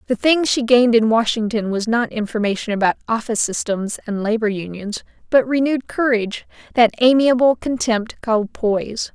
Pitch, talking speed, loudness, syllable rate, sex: 230 Hz, 150 wpm, -18 LUFS, 5.4 syllables/s, female